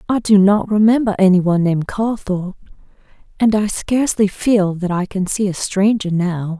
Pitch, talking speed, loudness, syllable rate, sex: 200 Hz, 175 wpm, -16 LUFS, 5.2 syllables/s, female